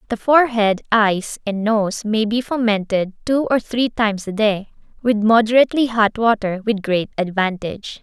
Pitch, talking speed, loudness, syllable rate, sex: 215 Hz, 155 wpm, -18 LUFS, 4.8 syllables/s, female